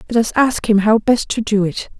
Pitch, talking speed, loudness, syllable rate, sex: 220 Hz, 270 wpm, -16 LUFS, 5.3 syllables/s, female